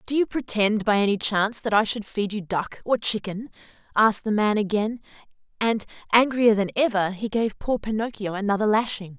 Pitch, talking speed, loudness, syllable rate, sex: 215 Hz, 185 wpm, -23 LUFS, 5.4 syllables/s, female